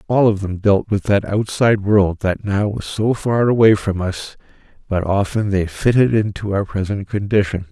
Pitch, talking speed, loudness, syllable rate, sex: 100 Hz, 185 wpm, -18 LUFS, 4.7 syllables/s, male